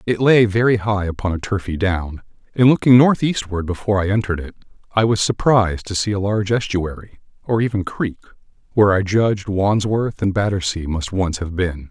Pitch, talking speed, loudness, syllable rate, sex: 100 Hz, 185 wpm, -18 LUFS, 5.6 syllables/s, male